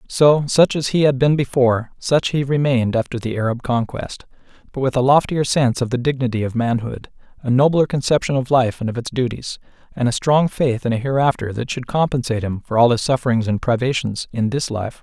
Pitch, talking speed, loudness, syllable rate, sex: 125 Hz, 210 wpm, -19 LUFS, 5.8 syllables/s, male